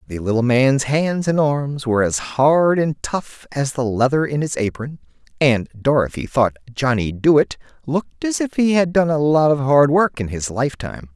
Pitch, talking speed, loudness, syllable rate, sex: 140 Hz, 195 wpm, -18 LUFS, 4.7 syllables/s, male